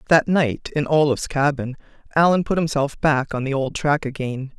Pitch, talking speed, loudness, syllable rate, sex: 145 Hz, 185 wpm, -20 LUFS, 4.8 syllables/s, female